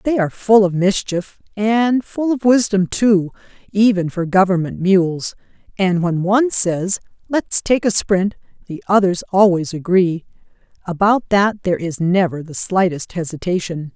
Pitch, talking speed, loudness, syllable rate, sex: 190 Hz, 140 wpm, -17 LUFS, 4.4 syllables/s, female